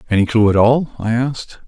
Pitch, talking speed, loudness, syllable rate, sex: 115 Hz, 215 wpm, -15 LUFS, 6.1 syllables/s, male